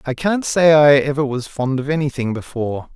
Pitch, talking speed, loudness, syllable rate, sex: 140 Hz, 205 wpm, -17 LUFS, 5.3 syllables/s, male